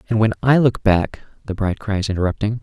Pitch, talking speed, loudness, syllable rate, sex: 105 Hz, 205 wpm, -19 LUFS, 6.3 syllables/s, male